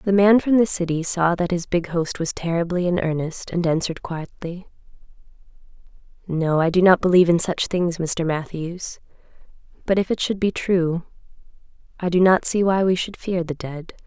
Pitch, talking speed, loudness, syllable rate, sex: 175 Hz, 185 wpm, -21 LUFS, 5.0 syllables/s, female